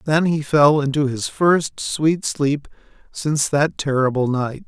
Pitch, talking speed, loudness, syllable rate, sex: 145 Hz, 155 wpm, -19 LUFS, 3.9 syllables/s, male